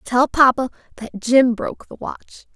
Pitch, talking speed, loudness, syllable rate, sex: 250 Hz, 165 wpm, -17 LUFS, 5.1 syllables/s, female